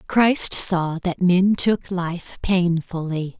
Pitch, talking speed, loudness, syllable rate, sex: 180 Hz, 125 wpm, -20 LUFS, 2.9 syllables/s, female